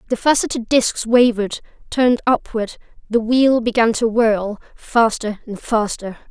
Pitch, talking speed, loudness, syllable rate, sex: 230 Hz, 105 wpm, -18 LUFS, 4.3 syllables/s, female